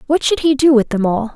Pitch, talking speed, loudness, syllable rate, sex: 260 Hz, 310 wpm, -14 LUFS, 5.9 syllables/s, female